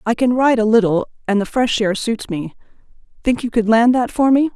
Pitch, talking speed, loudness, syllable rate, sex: 230 Hz, 235 wpm, -17 LUFS, 5.4 syllables/s, female